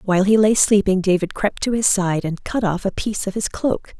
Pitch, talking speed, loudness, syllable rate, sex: 200 Hz, 255 wpm, -19 LUFS, 5.5 syllables/s, female